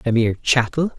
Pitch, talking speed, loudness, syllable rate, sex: 125 Hz, 185 wpm, -19 LUFS, 6.1 syllables/s, male